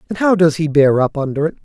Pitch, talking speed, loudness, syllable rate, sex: 155 Hz, 295 wpm, -15 LUFS, 6.4 syllables/s, male